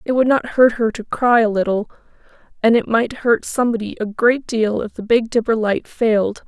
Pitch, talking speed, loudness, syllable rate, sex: 230 Hz, 215 wpm, -17 LUFS, 5.2 syllables/s, female